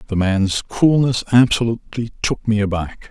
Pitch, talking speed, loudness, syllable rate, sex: 110 Hz, 135 wpm, -18 LUFS, 4.8 syllables/s, male